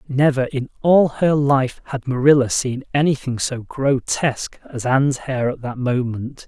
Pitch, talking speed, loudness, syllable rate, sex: 135 Hz, 155 wpm, -19 LUFS, 4.4 syllables/s, male